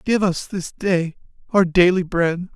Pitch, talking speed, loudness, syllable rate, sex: 180 Hz, 165 wpm, -19 LUFS, 3.8 syllables/s, male